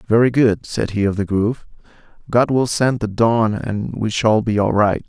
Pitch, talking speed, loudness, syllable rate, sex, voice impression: 110 Hz, 215 wpm, -18 LUFS, 4.7 syllables/s, male, very masculine, slightly adult-like, slightly thick, tensed, powerful, bright, soft, clear, fluent, cool, very intellectual, refreshing, very sincere, very calm, slightly mature, very friendly, very reassuring, unique, very elegant, slightly wild, very sweet, lively, very kind, slightly modest